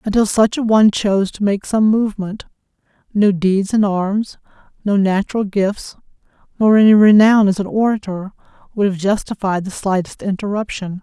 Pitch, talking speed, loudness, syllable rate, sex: 205 Hz, 150 wpm, -16 LUFS, 5.1 syllables/s, female